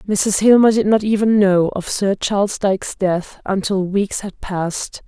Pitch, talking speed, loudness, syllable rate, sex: 200 Hz, 180 wpm, -17 LUFS, 4.3 syllables/s, female